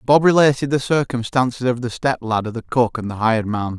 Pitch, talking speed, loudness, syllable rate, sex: 125 Hz, 220 wpm, -19 LUFS, 5.7 syllables/s, male